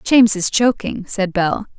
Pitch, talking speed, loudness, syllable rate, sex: 205 Hz, 170 wpm, -17 LUFS, 4.5 syllables/s, female